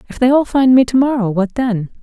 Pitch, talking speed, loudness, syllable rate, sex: 240 Hz, 265 wpm, -14 LUFS, 5.7 syllables/s, female